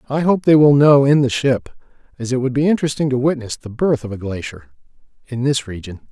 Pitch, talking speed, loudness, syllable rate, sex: 135 Hz, 225 wpm, -16 LUFS, 5.9 syllables/s, male